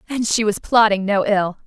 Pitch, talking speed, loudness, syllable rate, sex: 210 Hz, 215 wpm, -18 LUFS, 5.0 syllables/s, female